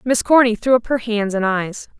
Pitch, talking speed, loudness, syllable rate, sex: 225 Hz, 240 wpm, -17 LUFS, 5.0 syllables/s, female